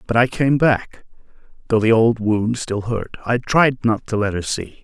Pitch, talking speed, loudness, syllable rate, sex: 115 Hz, 210 wpm, -18 LUFS, 4.4 syllables/s, male